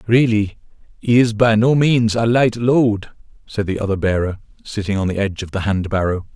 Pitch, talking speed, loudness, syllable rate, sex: 110 Hz, 200 wpm, -17 LUFS, 5.2 syllables/s, male